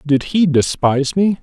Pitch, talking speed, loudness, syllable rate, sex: 155 Hz, 170 wpm, -16 LUFS, 4.6 syllables/s, male